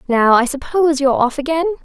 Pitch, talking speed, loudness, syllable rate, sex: 285 Hz, 195 wpm, -15 LUFS, 6.2 syllables/s, female